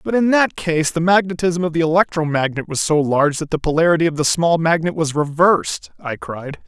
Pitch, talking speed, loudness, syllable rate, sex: 165 Hz, 205 wpm, -17 LUFS, 5.6 syllables/s, male